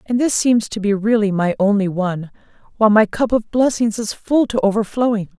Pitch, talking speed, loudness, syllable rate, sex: 215 Hz, 200 wpm, -17 LUFS, 5.6 syllables/s, female